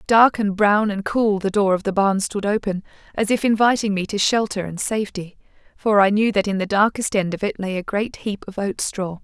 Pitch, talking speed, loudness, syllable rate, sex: 205 Hz, 240 wpm, -20 LUFS, 5.3 syllables/s, female